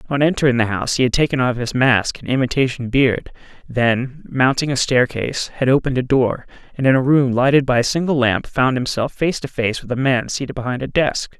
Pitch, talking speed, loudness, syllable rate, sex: 130 Hz, 220 wpm, -18 LUFS, 5.7 syllables/s, male